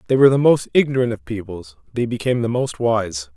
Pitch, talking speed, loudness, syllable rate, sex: 120 Hz, 215 wpm, -19 LUFS, 6.1 syllables/s, male